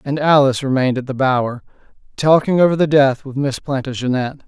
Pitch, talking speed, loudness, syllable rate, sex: 135 Hz, 175 wpm, -16 LUFS, 6.0 syllables/s, male